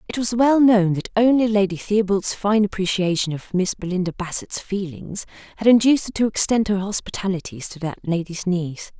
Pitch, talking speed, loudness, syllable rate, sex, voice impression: 195 Hz, 175 wpm, -20 LUFS, 5.4 syllables/s, female, feminine, adult-like, relaxed, powerful, bright, soft, raspy, intellectual, elegant, lively